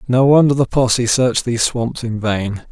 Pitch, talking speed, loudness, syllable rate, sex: 120 Hz, 200 wpm, -16 LUFS, 4.7 syllables/s, male